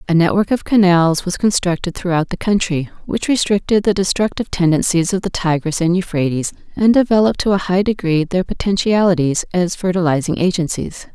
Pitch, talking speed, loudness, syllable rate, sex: 180 Hz, 160 wpm, -16 LUFS, 5.6 syllables/s, female